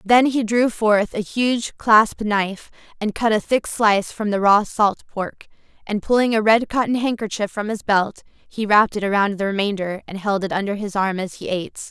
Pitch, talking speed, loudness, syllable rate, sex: 210 Hz, 210 wpm, -20 LUFS, 5.0 syllables/s, female